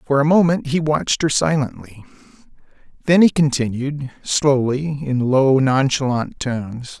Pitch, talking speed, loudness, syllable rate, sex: 135 Hz, 130 wpm, -18 LUFS, 4.4 syllables/s, male